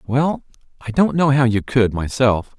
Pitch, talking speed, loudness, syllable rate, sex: 125 Hz, 185 wpm, -18 LUFS, 4.3 syllables/s, male